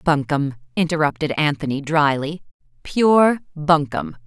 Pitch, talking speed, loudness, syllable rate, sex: 155 Hz, 85 wpm, -19 LUFS, 4.2 syllables/s, female